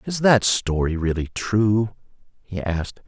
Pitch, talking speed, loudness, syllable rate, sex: 100 Hz, 135 wpm, -21 LUFS, 4.2 syllables/s, male